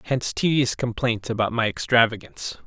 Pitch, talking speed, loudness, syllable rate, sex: 115 Hz, 135 wpm, -23 LUFS, 5.7 syllables/s, male